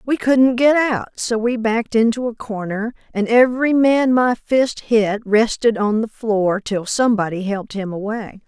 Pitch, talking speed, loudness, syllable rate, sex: 225 Hz, 175 wpm, -18 LUFS, 4.5 syllables/s, female